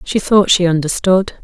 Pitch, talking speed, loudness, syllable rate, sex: 185 Hz, 165 wpm, -13 LUFS, 4.7 syllables/s, female